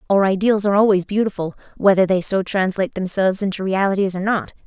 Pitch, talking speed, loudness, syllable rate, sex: 195 Hz, 180 wpm, -19 LUFS, 6.5 syllables/s, female